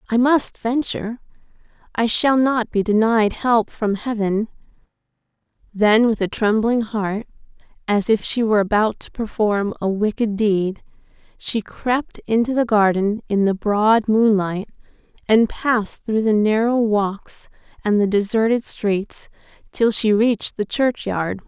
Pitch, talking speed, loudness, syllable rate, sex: 215 Hz, 140 wpm, -19 LUFS, 4.1 syllables/s, female